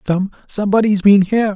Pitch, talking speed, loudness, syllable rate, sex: 200 Hz, 115 wpm, -15 LUFS, 6.0 syllables/s, male